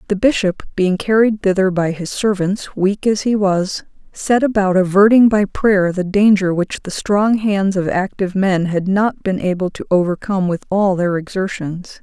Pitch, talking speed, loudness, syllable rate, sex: 195 Hz, 180 wpm, -16 LUFS, 4.6 syllables/s, female